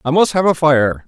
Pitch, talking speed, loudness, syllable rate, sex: 150 Hz, 280 wpm, -14 LUFS, 5.2 syllables/s, male